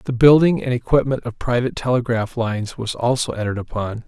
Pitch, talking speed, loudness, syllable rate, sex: 120 Hz, 175 wpm, -19 LUFS, 6.1 syllables/s, male